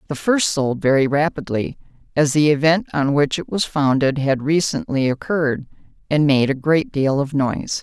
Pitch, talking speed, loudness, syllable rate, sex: 145 Hz, 175 wpm, -19 LUFS, 4.8 syllables/s, female